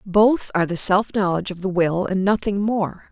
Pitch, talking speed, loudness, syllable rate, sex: 190 Hz, 210 wpm, -20 LUFS, 5.1 syllables/s, female